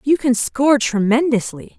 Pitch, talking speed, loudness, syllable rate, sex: 255 Hz, 135 wpm, -17 LUFS, 4.7 syllables/s, female